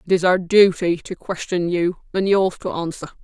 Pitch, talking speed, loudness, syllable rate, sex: 180 Hz, 205 wpm, -20 LUFS, 4.9 syllables/s, female